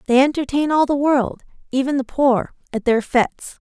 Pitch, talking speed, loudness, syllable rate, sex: 265 Hz, 180 wpm, -19 LUFS, 5.1 syllables/s, female